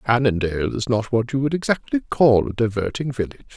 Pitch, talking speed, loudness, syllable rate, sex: 120 Hz, 185 wpm, -21 LUFS, 6.4 syllables/s, male